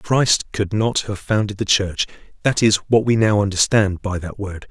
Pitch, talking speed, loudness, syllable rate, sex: 100 Hz, 215 wpm, -19 LUFS, 4.7 syllables/s, male